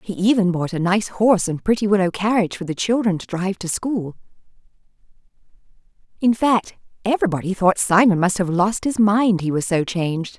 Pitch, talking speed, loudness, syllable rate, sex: 195 Hz, 180 wpm, -19 LUFS, 5.6 syllables/s, female